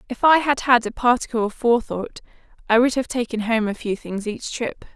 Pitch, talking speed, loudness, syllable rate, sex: 235 Hz, 220 wpm, -21 LUFS, 5.5 syllables/s, female